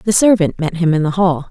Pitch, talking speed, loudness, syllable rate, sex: 175 Hz, 280 wpm, -15 LUFS, 5.4 syllables/s, female